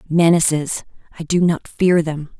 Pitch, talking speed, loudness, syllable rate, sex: 165 Hz, 125 wpm, -17 LUFS, 4.3 syllables/s, female